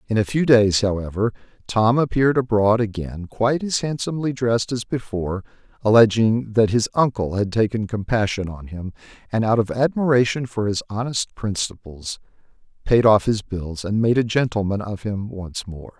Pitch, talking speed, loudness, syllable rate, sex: 110 Hz, 165 wpm, -21 LUFS, 5.1 syllables/s, male